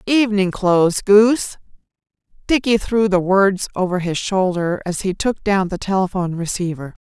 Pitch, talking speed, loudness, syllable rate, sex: 195 Hz, 145 wpm, -18 LUFS, 5.0 syllables/s, female